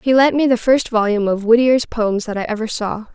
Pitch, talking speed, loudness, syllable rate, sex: 230 Hz, 250 wpm, -16 LUFS, 5.6 syllables/s, female